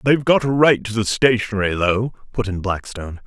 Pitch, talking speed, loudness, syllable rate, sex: 110 Hz, 200 wpm, -18 LUFS, 5.8 syllables/s, male